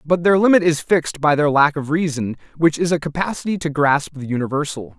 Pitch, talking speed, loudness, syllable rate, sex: 155 Hz, 215 wpm, -18 LUFS, 5.8 syllables/s, male